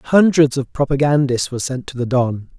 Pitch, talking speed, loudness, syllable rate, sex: 135 Hz, 185 wpm, -17 LUFS, 5.2 syllables/s, male